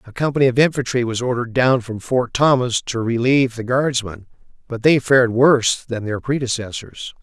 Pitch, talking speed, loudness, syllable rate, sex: 125 Hz, 175 wpm, -18 LUFS, 5.5 syllables/s, male